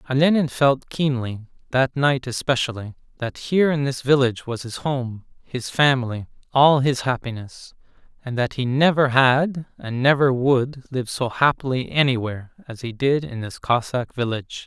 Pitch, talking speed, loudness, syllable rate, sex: 130 Hz, 155 wpm, -21 LUFS, 4.8 syllables/s, male